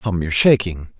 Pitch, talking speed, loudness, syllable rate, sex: 95 Hz, 180 wpm, -16 LUFS, 5.4 syllables/s, male